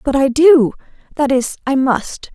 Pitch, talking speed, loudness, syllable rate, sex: 270 Hz, 155 wpm, -14 LUFS, 4.1 syllables/s, female